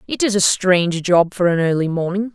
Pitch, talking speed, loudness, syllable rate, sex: 185 Hz, 230 wpm, -17 LUFS, 5.5 syllables/s, female